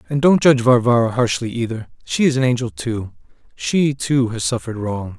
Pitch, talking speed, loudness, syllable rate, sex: 120 Hz, 185 wpm, -18 LUFS, 5.4 syllables/s, male